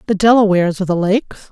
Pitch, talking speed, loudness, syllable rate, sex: 200 Hz, 200 wpm, -14 LUFS, 7.4 syllables/s, female